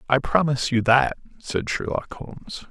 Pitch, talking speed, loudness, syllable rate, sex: 130 Hz, 155 wpm, -22 LUFS, 4.8 syllables/s, male